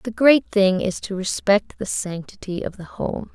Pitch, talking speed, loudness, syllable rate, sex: 200 Hz, 195 wpm, -21 LUFS, 4.4 syllables/s, female